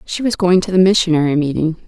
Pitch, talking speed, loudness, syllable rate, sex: 170 Hz, 225 wpm, -15 LUFS, 6.4 syllables/s, female